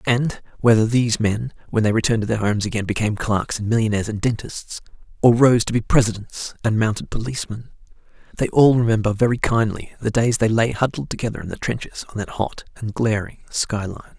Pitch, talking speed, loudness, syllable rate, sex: 110 Hz, 195 wpm, -21 LUFS, 6.0 syllables/s, male